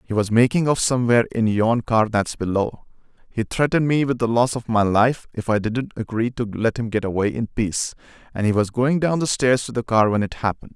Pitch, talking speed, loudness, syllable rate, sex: 115 Hz, 235 wpm, -21 LUFS, 5.7 syllables/s, male